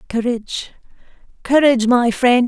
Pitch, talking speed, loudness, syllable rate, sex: 245 Hz, 95 wpm, -16 LUFS, 4.9 syllables/s, female